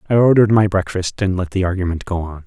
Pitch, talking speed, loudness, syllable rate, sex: 95 Hz, 245 wpm, -17 LUFS, 6.6 syllables/s, male